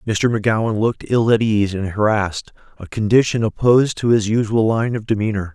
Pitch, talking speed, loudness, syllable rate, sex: 110 Hz, 175 wpm, -18 LUFS, 5.8 syllables/s, male